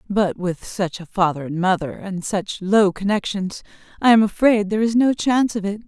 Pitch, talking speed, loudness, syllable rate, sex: 200 Hz, 205 wpm, -20 LUFS, 5.1 syllables/s, female